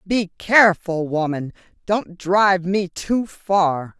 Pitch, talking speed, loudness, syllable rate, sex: 185 Hz, 120 wpm, -19 LUFS, 3.5 syllables/s, female